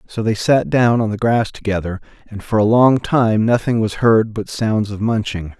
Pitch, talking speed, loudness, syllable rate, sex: 110 Hz, 215 wpm, -17 LUFS, 4.6 syllables/s, male